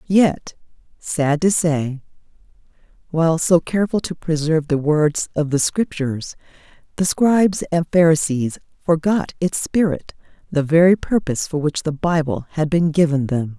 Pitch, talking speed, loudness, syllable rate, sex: 160 Hz, 140 wpm, -19 LUFS, 4.7 syllables/s, female